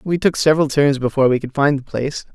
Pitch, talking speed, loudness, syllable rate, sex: 140 Hz, 255 wpm, -17 LUFS, 6.9 syllables/s, male